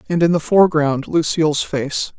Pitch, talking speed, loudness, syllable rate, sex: 155 Hz, 165 wpm, -17 LUFS, 5.0 syllables/s, female